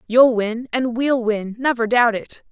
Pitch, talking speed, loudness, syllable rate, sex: 235 Hz, 165 wpm, -19 LUFS, 4.1 syllables/s, female